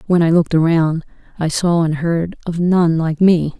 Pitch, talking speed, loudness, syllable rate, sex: 165 Hz, 200 wpm, -16 LUFS, 4.7 syllables/s, female